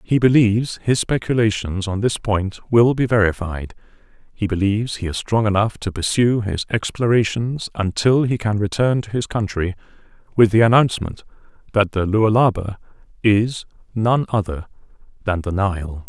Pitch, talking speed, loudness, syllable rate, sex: 105 Hz, 145 wpm, -19 LUFS, 4.9 syllables/s, male